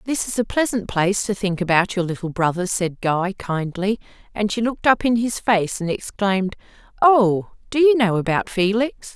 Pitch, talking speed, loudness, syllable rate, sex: 205 Hz, 190 wpm, -20 LUFS, 5.1 syllables/s, female